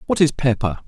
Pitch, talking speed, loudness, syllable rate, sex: 120 Hz, 205 wpm, -19 LUFS, 6.3 syllables/s, male